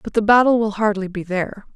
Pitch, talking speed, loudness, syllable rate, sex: 210 Hz, 240 wpm, -18 LUFS, 6.0 syllables/s, female